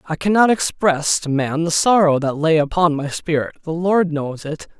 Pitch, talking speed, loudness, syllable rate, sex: 160 Hz, 200 wpm, -18 LUFS, 4.7 syllables/s, male